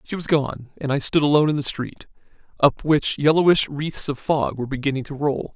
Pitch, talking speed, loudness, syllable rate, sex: 145 Hz, 215 wpm, -21 LUFS, 5.5 syllables/s, male